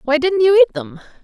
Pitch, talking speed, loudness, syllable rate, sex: 305 Hz, 240 wpm, -14 LUFS, 5.9 syllables/s, female